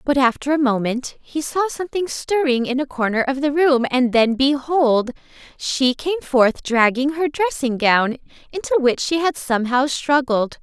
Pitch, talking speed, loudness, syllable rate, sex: 270 Hz, 170 wpm, -19 LUFS, 4.5 syllables/s, female